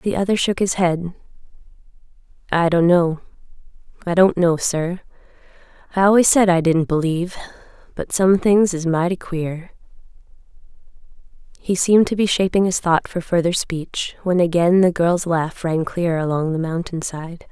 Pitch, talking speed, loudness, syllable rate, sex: 175 Hz, 150 wpm, -18 LUFS, 4.8 syllables/s, female